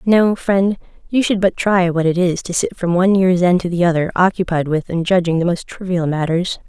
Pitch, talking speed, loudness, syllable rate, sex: 180 Hz, 235 wpm, -16 LUFS, 5.3 syllables/s, female